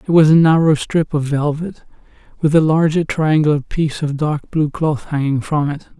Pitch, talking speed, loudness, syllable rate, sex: 150 Hz, 190 wpm, -16 LUFS, 4.9 syllables/s, male